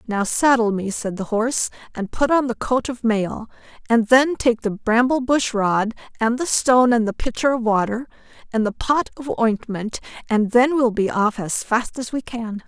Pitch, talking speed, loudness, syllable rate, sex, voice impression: 230 Hz, 205 wpm, -20 LUFS, 4.6 syllables/s, female, feminine, middle-aged, powerful, bright, slightly soft, raspy, friendly, reassuring, elegant, kind